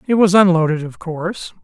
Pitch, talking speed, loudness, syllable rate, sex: 175 Hz, 185 wpm, -16 LUFS, 5.6 syllables/s, male